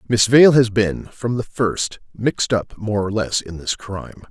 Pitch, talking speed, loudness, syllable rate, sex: 110 Hz, 210 wpm, -19 LUFS, 4.3 syllables/s, male